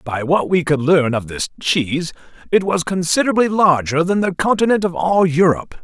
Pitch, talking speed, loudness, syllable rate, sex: 170 Hz, 185 wpm, -17 LUFS, 5.3 syllables/s, male